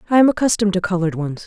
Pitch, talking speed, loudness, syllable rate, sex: 195 Hz, 245 wpm, -18 LUFS, 8.7 syllables/s, female